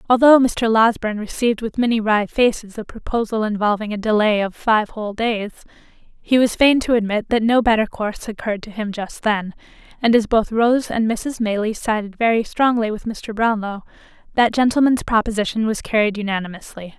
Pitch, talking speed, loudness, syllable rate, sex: 220 Hz, 175 wpm, -19 LUFS, 5.4 syllables/s, female